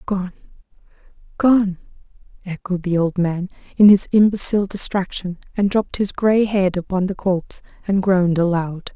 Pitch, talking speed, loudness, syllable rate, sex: 190 Hz, 140 wpm, -18 LUFS, 5.0 syllables/s, female